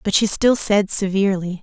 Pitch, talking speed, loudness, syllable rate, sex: 200 Hz, 185 wpm, -18 LUFS, 5.2 syllables/s, female